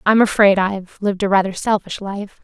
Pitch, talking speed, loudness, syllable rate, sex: 200 Hz, 195 wpm, -17 LUFS, 5.7 syllables/s, female